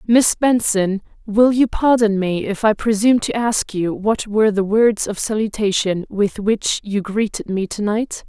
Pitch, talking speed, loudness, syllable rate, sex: 210 Hz, 180 wpm, -18 LUFS, 4.3 syllables/s, female